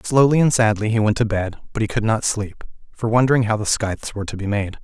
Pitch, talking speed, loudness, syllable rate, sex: 110 Hz, 260 wpm, -19 LUFS, 6.3 syllables/s, male